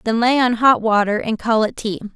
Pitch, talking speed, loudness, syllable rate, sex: 225 Hz, 250 wpm, -17 LUFS, 5.3 syllables/s, female